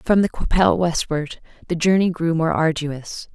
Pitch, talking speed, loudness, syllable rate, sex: 170 Hz, 160 wpm, -20 LUFS, 5.0 syllables/s, female